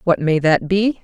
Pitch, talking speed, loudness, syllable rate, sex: 175 Hz, 235 wpm, -17 LUFS, 4.3 syllables/s, female